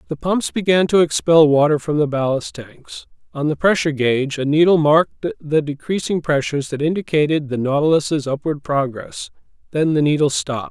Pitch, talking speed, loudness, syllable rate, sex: 150 Hz, 170 wpm, -18 LUFS, 5.3 syllables/s, male